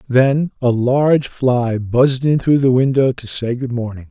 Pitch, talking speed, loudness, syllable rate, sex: 125 Hz, 190 wpm, -16 LUFS, 4.4 syllables/s, male